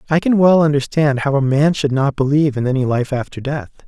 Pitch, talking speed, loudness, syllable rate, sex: 145 Hz, 230 wpm, -16 LUFS, 6.0 syllables/s, male